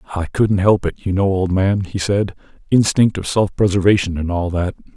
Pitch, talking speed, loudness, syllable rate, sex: 95 Hz, 205 wpm, -17 LUFS, 5.2 syllables/s, male